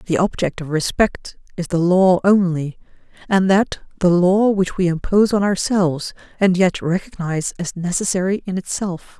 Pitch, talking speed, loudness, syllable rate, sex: 180 Hz, 155 wpm, -18 LUFS, 4.8 syllables/s, female